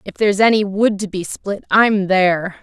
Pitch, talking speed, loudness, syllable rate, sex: 200 Hz, 205 wpm, -16 LUFS, 4.9 syllables/s, female